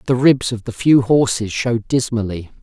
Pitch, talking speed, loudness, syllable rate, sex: 120 Hz, 185 wpm, -17 LUFS, 5.0 syllables/s, male